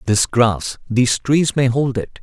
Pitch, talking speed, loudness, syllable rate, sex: 120 Hz, 190 wpm, -17 LUFS, 4.1 syllables/s, male